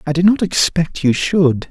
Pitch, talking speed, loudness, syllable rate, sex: 165 Hz, 210 wpm, -15 LUFS, 4.4 syllables/s, male